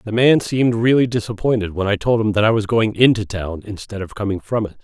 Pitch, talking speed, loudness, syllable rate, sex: 105 Hz, 250 wpm, -18 LUFS, 6.0 syllables/s, male